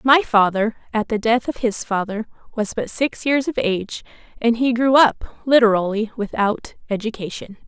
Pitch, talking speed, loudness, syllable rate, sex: 225 Hz, 165 wpm, -19 LUFS, 4.8 syllables/s, female